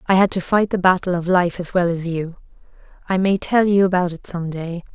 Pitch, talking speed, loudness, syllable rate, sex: 180 Hz, 245 wpm, -19 LUFS, 5.4 syllables/s, female